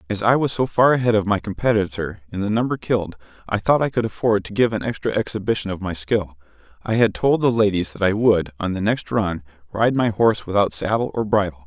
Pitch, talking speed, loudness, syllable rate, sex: 105 Hz, 230 wpm, -20 LUFS, 6.0 syllables/s, male